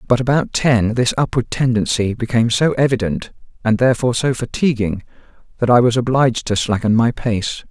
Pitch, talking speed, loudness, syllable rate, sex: 120 Hz, 165 wpm, -17 LUFS, 5.6 syllables/s, male